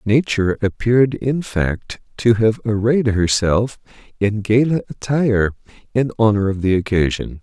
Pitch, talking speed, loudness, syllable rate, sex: 110 Hz, 130 wpm, -18 LUFS, 4.6 syllables/s, male